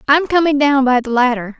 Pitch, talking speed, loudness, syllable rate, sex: 270 Hz, 225 wpm, -14 LUFS, 5.6 syllables/s, female